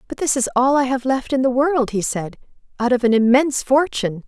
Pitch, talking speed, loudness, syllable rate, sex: 255 Hz, 240 wpm, -18 LUFS, 5.8 syllables/s, female